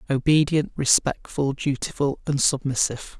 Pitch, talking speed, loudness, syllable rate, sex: 140 Hz, 95 wpm, -22 LUFS, 4.8 syllables/s, male